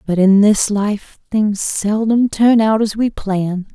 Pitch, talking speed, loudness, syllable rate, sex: 210 Hz, 175 wpm, -15 LUFS, 3.5 syllables/s, female